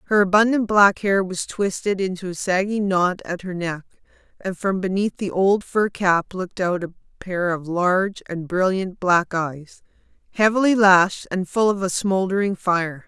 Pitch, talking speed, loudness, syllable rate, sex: 190 Hz, 175 wpm, -20 LUFS, 4.5 syllables/s, female